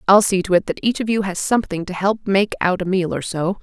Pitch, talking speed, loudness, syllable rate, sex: 190 Hz, 300 wpm, -19 LUFS, 5.9 syllables/s, female